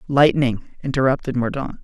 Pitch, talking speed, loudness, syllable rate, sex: 130 Hz, 100 wpm, -20 LUFS, 5.4 syllables/s, male